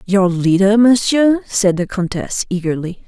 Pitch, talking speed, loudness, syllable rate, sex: 200 Hz, 135 wpm, -15 LUFS, 4.5 syllables/s, female